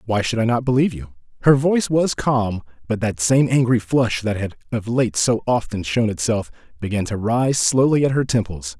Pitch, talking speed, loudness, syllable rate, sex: 115 Hz, 205 wpm, -19 LUFS, 5.1 syllables/s, male